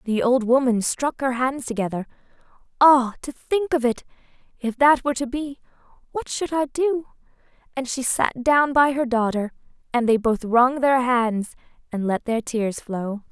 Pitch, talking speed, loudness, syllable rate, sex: 250 Hz, 175 wpm, -21 LUFS, 4.5 syllables/s, female